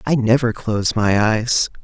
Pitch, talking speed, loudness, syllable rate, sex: 115 Hz, 165 wpm, -17 LUFS, 4.4 syllables/s, male